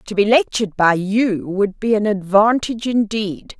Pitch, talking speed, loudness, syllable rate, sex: 210 Hz, 165 wpm, -17 LUFS, 4.6 syllables/s, female